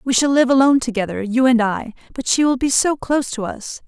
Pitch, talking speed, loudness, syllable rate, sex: 250 Hz, 250 wpm, -17 LUFS, 6.0 syllables/s, female